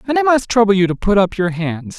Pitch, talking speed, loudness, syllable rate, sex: 205 Hz, 270 wpm, -15 LUFS, 6.0 syllables/s, male